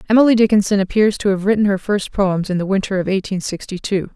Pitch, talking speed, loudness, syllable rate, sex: 200 Hz, 230 wpm, -17 LUFS, 6.3 syllables/s, female